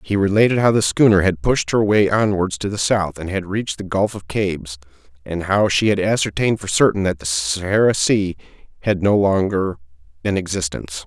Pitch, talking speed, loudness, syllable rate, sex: 95 Hz, 195 wpm, -18 LUFS, 5.5 syllables/s, male